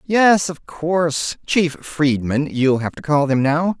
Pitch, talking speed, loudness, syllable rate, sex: 155 Hz, 160 wpm, -18 LUFS, 3.6 syllables/s, male